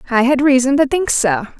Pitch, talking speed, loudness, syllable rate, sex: 265 Hz, 225 wpm, -14 LUFS, 5.6 syllables/s, female